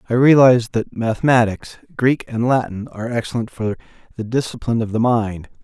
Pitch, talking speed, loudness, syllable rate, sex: 115 Hz, 160 wpm, -18 LUFS, 5.7 syllables/s, male